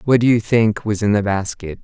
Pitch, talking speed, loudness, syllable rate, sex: 110 Hz, 260 wpm, -17 LUFS, 5.3 syllables/s, male